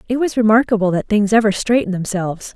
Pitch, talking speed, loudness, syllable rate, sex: 210 Hz, 190 wpm, -16 LUFS, 6.8 syllables/s, female